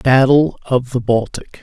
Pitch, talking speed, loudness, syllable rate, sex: 130 Hz, 150 wpm, -15 LUFS, 3.9 syllables/s, male